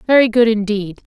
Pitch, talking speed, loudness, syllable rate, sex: 220 Hz, 160 wpm, -15 LUFS, 5.6 syllables/s, female